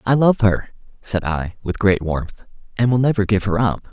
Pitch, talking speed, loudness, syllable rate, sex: 105 Hz, 215 wpm, -19 LUFS, 4.8 syllables/s, male